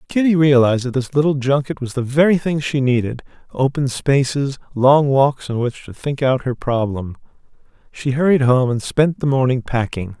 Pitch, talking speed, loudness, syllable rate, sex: 135 Hz, 175 wpm, -18 LUFS, 5.0 syllables/s, male